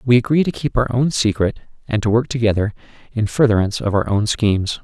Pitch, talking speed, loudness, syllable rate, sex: 115 Hz, 210 wpm, -18 LUFS, 6.1 syllables/s, male